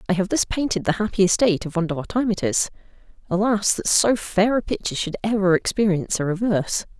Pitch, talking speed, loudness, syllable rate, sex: 195 Hz, 170 wpm, -21 LUFS, 6.3 syllables/s, female